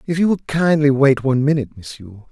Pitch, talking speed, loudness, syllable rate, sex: 140 Hz, 235 wpm, -16 LUFS, 6.2 syllables/s, male